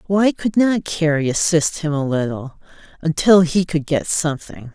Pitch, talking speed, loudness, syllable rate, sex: 160 Hz, 165 wpm, -18 LUFS, 4.6 syllables/s, female